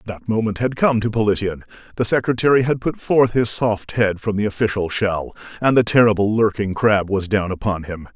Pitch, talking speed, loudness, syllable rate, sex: 105 Hz, 200 wpm, -19 LUFS, 5.3 syllables/s, male